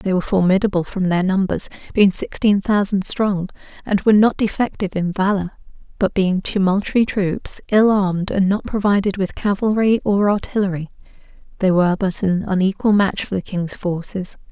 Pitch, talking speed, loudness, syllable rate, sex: 195 Hz, 160 wpm, -18 LUFS, 5.3 syllables/s, female